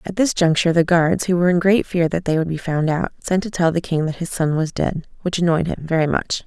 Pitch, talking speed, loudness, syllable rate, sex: 170 Hz, 290 wpm, -19 LUFS, 5.8 syllables/s, female